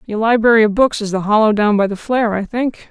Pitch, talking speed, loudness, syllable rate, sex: 220 Hz, 270 wpm, -15 LUFS, 6.1 syllables/s, female